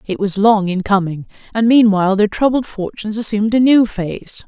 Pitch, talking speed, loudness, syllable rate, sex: 210 Hz, 190 wpm, -15 LUFS, 5.7 syllables/s, female